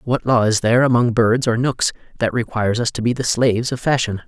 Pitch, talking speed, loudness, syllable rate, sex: 120 Hz, 240 wpm, -18 LUFS, 5.9 syllables/s, male